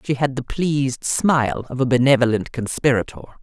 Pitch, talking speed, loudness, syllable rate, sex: 130 Hz, 160 wpm, -19 LUFS, 5.5 syllables/s, female